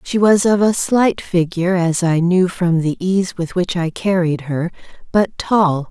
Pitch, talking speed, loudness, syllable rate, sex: 180 Hz, 195 wpm, -17 LUFS, 4.1 syllables/s, female